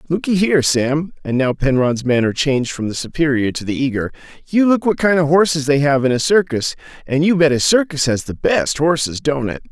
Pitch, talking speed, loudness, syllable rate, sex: 145 Hz, 210 wpm, -17 LUFS, 5.6 syllables/s, male